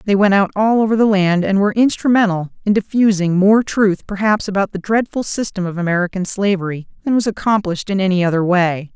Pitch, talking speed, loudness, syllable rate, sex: 195 Hz, 195 wpm, -16 LUFS, 5.9 syllables/s, female